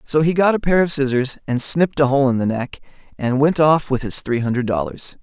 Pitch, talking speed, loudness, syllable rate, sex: 140 Hz, 250 wpm, -18 LUFS, 5.5 syllables/s, male